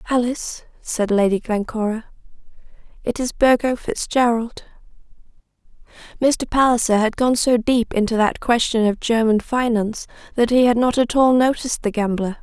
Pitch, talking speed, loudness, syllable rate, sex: 235 Hz, 140 wpm, -19 LUFS, 5.1 syllables/s, female